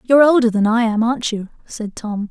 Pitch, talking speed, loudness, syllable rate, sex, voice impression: 230 Hz, 235 wpm, -16 LUFS, 5.8 syllables/s, female, feminine, adult-like, slightly relaxed, powerful, soft, raspy, intellectual, calm, elegant, lively, sharp